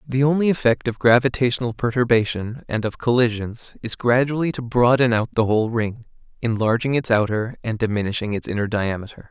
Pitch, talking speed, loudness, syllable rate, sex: 120 Hz, 160 wpm, -21 LUFS, 5.7 syllables/s, male